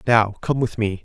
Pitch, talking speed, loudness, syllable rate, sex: 105 Hz, 230 wpm, -21 LUFS, 4.8 syllables/s, male